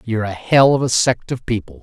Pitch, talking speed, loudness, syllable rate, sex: 115 Hz, 265 wpm, -17 LUFS, 5.8 syllables/s, male